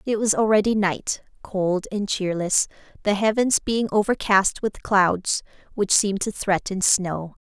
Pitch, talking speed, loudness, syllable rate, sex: 200 Hz, 145 wpm, -22 LUFS, 4.1 syllables/s, female